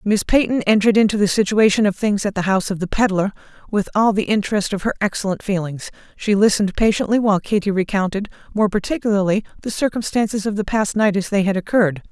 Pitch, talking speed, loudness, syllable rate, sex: 205 Hz, 200 wpm, -19 LUFS, 6.5 syllables/s, female